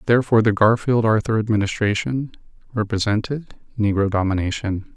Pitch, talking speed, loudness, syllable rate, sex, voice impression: 110 Hz, 95 wpm, -20 LUFS, 5.7 syllables/s, male, very masculine, very adult-like, very middle-aged, very thick, tensed, very powerful, slightly dark, slightly hard, slightly muffled, fluent, slightly raspy, very cool, intellectual, very sincere, very calm, very mature, very friendly, very reassuring, unique, very elegant, slightly wild, very sweet, slightly lively, very kind, modest